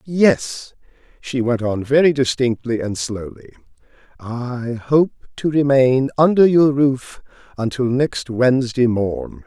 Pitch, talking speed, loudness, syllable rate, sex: 130 Hz, 120 wpm, -18 LUFS, 3.8 syllables/s, male